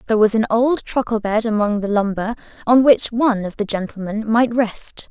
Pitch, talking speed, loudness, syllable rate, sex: 220 Hz, 200 wpm, -18 LUFS, 5.3 syllables/s, female